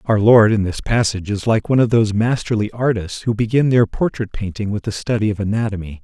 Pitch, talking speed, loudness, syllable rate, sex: 110 Hz, 220 wpm, -18 LUFS, 6.1 syllables/s, male